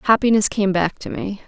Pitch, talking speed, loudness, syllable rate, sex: 200 Hz, 205 wpm, -19 LUFS, 5.5 syllables/s, female